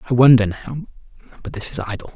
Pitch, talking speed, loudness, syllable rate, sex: 115 Hz, 165 wpm, -17 LUFS, 7.0 syllables/s, male